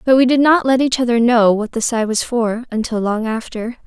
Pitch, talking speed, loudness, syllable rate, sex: 240 Hz, 250 wpm, -16 LUFS, 5.2 syllables/s, female